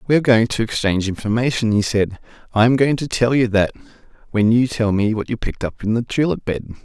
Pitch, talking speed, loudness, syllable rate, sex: 115 Hz, 235 wpm, -18 LUFS, 6.3 syllables/s, male